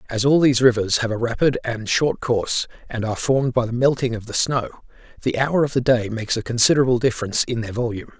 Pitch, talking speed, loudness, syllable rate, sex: 120 Hz, 225 wpm, -20 LUFS, 6.6 syllables/s, male